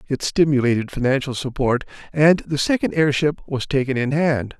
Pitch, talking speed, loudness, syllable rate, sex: 140 Hz, 155 wpm, -20 LUFS, 5.1 syllables/s, male